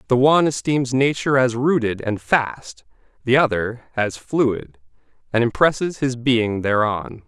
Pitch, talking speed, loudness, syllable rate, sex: 120 Hz, 140 wpm, -19 LUFS, 4.3 syllables/s, male